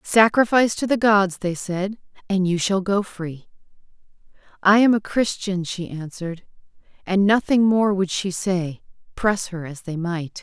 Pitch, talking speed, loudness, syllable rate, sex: 190 Hz, 160 wpm, -21 LUFS, 4.4 syllables/s, female